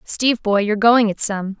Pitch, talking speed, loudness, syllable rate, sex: 215 Hz, 225 wpm, -17 LUFS, 5.4 syllables/s, female